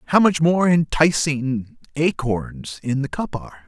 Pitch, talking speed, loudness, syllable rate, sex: 140 Hz, 145 wpm, -20 LUFS, 4.0 syllables/s, male